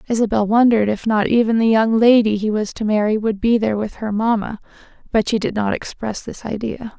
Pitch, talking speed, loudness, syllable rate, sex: 220 Hz, 215 wpm, -18 LUFS, 5.8 syllables/s, female